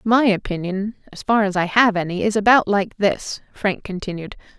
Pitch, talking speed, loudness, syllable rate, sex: 200 Hz, 185 wpm, -19 LUFS, 5.1 syllables/s, female